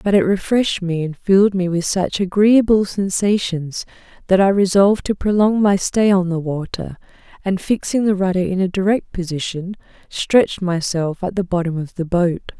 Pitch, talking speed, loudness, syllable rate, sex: 190 Hz, 175 wpm, -18 LUFS, 5.0 syllables/s, female